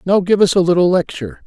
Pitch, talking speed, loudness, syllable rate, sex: 180 Hz, 245 wpm, -14 LUFS, 6.6 syllables/s, male